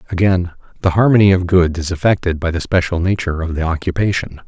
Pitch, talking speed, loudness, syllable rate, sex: 90 Hz, 190 wpm, -16 LUFS, 6.4 syllables/s, male